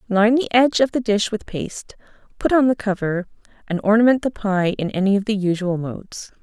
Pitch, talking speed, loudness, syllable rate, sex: 210 Hz, 205 wpm, -19 LUFS, 5.7 syllables/s, female